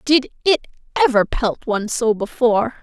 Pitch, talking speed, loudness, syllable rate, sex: 240 Hz, 150 wpm, -18 LUFS, 4.9 syllables/s, female